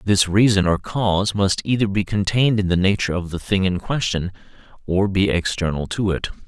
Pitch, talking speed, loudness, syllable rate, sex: 95 Hz, 195 wpm, -20 LUFS, 5.5 syllables/s, male